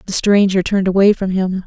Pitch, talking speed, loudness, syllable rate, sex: 190 Hz, 215 wpm, -15 LUFS, 6.0 syllables/s, female